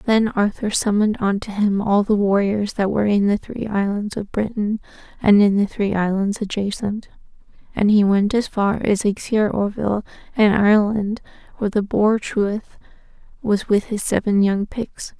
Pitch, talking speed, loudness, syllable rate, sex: 205 Hz, 165 wpm, -19 LUFS, 4.7 syllables/s, female